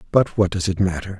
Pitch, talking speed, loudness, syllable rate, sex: 95 Hz, 250 wpm, -20 LUFS, 6.3 syllables/s, male